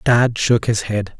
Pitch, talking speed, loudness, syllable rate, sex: 110 Hz, 200 wpm, -17 LUFS, 3.7 syllables/s, male